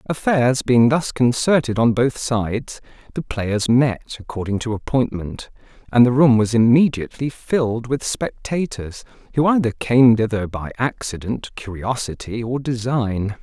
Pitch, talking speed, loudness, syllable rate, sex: 120 Hz, 135 wpm, -19 LUFS, 4.4 syllables/s, male